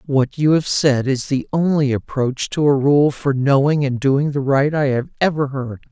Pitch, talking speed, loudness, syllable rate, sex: 140 Hz, 215 wpm, -18 LUFS, 4.5 syllables/s, male